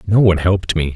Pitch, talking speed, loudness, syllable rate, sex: 90 Hz, 250 wpm, -15 LUFS, 7.4 syllables/s, male